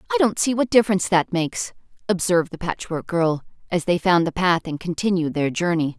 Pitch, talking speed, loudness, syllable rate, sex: 180 Hz, 200 wpm, -21 LUFS, 5.9 syllables/s, female